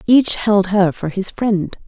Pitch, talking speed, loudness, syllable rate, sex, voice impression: 195 Hz, 190 wpm, -17 LUFS, 3.6 syllables/s, female, very feminine, adult-like, slightly soft, slightly calm, elegant, slightly kind